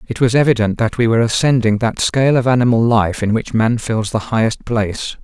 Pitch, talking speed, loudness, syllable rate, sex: 115 Hz, 220 wpm, -15 LUFS, 5.8 syllables/s, male